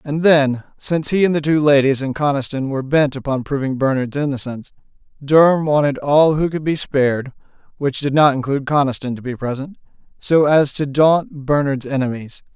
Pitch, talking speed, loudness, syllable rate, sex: 140 Hz, 170 wpm, -17 LUFS, 5.4 syllables/s, male